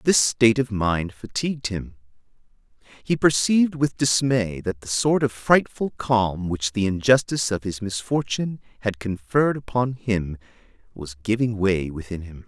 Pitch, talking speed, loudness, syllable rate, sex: 110 Hz, 150 wpm, -22 LUFS, 4.7 syllables/s, male